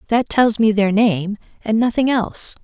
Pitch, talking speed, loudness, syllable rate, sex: 220 Hz, 180 wpm, -17 LUFS, 4.6 syllables/s, female